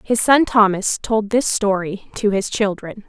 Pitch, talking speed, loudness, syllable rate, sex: 210 Hz, 175 wpm, -18 LUFS, 4.1 syllables/s, female